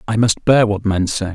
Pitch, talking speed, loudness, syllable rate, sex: 105 Hz, 270 wpm, -16 LUFS, 5.0 syllables/s, male